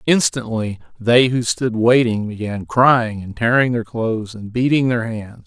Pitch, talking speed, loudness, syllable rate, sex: 115 Hz, 165 wpm, -18 LUFS, 4.3 syllables/s, male